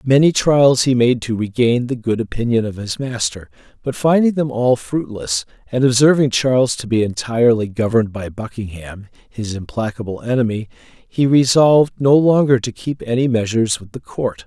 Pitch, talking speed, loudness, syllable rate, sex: 120 Hz, 165 wpm, -17 LUFS, 5.1 syllables/s, male